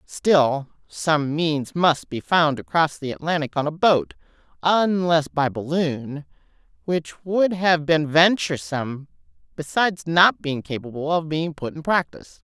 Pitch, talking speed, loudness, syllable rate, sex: 160 Hz, 140 wpm, -21 LUFS, 4.2 syllables/s, female